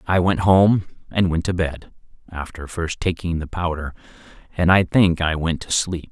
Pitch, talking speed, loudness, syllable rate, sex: 85 Hz, 185 wpm, -20 LUFS, 4.6 syllables/s, male